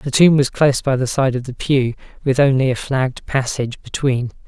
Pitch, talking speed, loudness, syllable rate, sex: 130 Hz, 215 wpm, -18 LUFS, 5.5 syllables/s, male